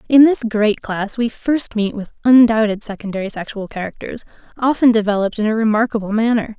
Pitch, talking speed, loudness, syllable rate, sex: 220 Hz, 165 wpm, -17 LUFS, 5.7 syllables/s, female